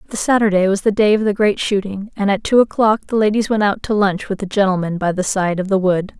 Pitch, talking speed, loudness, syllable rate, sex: 200 Hz, 270 wpm, -17 LUFS, 6.0 syllables/s, female